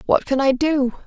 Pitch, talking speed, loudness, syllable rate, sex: 275 Hz, 225 wpm, -19 LUFS, 4.6 syllables/s, female